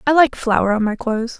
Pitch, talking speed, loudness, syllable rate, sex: 240 Hz, 255 wpm, -17 LUFS, 5.5 syllables/s, female